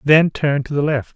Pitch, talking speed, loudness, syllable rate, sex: 145 Hz, 260 wpm, -17 LUFS, 4.8 syllables/s, male